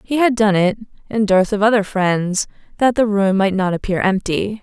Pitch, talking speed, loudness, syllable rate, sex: 205 Hz, 210 wpm, -17 LUFS, 4.9 syllables/s, female